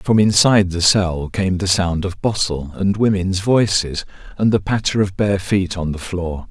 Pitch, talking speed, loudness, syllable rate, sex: 95 Hz, 195 wpm, -18 LUFS, 4.5 syllables/s, male